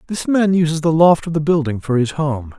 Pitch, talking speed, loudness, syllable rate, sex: 155 Hz, 255 wpm, -16 LUFS, 5.5 syllables/s, male